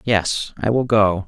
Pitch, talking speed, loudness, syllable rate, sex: 105 Hz, 190 wpm, -19 LUFS, 3.5 syllables/s, male